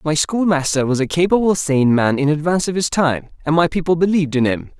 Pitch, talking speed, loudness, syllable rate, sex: 160 Hz, 225 wpm, -17 LUFS, 6.2 syllables/s, male